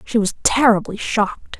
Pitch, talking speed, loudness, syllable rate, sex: 215 Hz, 150 wpm, -18 LUFS, 5.0 syllables/s, female